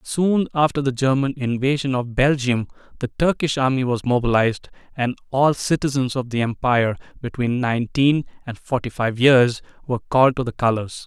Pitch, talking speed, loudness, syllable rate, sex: 130 Hz, 155 wpm, -20 LUFS, 5.3 syllables/s, male